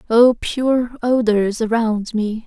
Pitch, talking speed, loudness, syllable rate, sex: 230 Hz, 120 wpm, -18 LUFS, 3.2 syllables/s, female